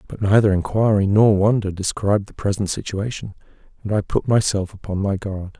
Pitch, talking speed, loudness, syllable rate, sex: 100 Hz, 170 wpm, -20 LUFS, 5.5 syllables/s, male